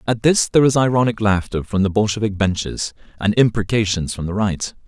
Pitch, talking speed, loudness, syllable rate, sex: 105 Hz, 185 wpm, -18 LUFS, 5.7 syllables/s, male